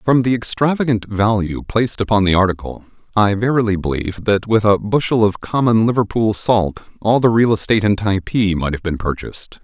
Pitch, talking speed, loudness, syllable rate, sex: 105 Hz, 180 wpm, -17 LUFS, 5.5 syllables/s, male